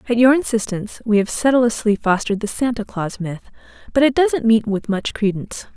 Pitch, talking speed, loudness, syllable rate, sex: 225 Hz, 190 wpm, -18 LUFS, 5.7 syllables/s, female